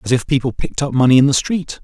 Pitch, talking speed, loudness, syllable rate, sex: 135 Hz, 295 wpm, -16 LUFS, 7.1 syllables/s, male